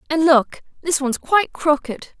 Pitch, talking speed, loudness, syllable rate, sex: 300 Hz, 190 wpm, -18 LUFS, 5.7 syllables/s, female